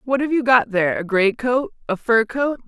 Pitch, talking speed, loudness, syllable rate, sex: 240 Hz, 245 wpm, -19 LUFS, 5.1 syllables/s, female